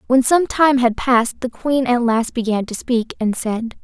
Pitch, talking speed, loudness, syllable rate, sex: 245 Hz, 220 wpm, -18 LUFS, 4.5 syllables/s, female